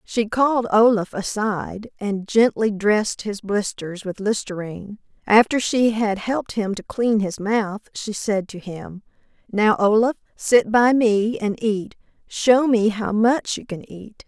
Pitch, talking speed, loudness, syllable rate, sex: 215 Hz, 160 wpm, -20 LUFS, 4.1 syllables/s, female